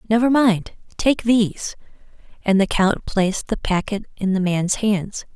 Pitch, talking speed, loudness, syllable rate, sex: 205 Hz, 145 wpm, -20 LUFS, 4.4 syllables/s, female